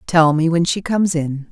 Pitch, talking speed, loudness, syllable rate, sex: 165 Hz, 240 wpm, -17 LUFS, 5.2 syllables/s, female